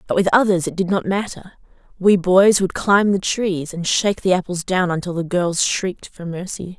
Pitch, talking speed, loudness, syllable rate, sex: 185 Hz, 210 wpm, -18 LUFS, 5.1 syllables/s, female